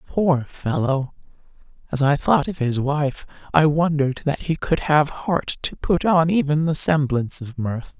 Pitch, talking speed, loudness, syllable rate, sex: 155 Hz, 165 wpm, -21 LUFS, 4.4 syllables/s, female